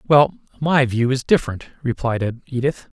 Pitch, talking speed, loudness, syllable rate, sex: 130 Hz, 140 wpm, -20 LUFS, 4.5 syllables/s, male